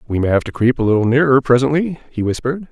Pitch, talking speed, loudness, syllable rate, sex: 130 Hz, 245 wpm, -16 LUFS, 6.9 syllables/s, male